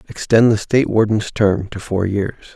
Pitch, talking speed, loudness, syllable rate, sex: 105 Hz, 190 wpm, -17 LUFS, 5.0 syllables/s, male